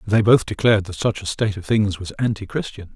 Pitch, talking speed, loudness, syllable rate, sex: 105 Hz, 225 wpm, -20 LUFS, 6.0 syllables/s, male